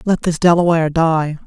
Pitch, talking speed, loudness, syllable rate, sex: 165 Hz, 165 wpm, -15 LUFS, 5.3 syllables/s, female